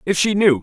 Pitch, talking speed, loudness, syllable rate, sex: 175 Hz, 285 wpm, -16 LUFS, 5.9 syllables/s, male